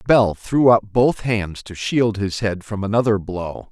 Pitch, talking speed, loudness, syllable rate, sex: 105 Hz, 195 wpm, -19 LUFS, 4.0 syllables/s, male